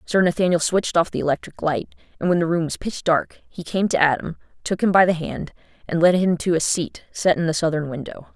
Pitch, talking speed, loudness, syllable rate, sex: 170 Hz, 245 wpm, -21 LUFS, 5.9 syllables/s, female